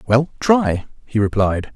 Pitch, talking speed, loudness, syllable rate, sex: 120 Hz, 135 wpm, -18 LUFS, 3.7 syllables/s, male